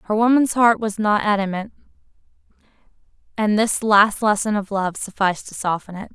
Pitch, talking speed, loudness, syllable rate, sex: 210 Hz, 155 wpm, -19 LUFS, 5.3 syllables/s, female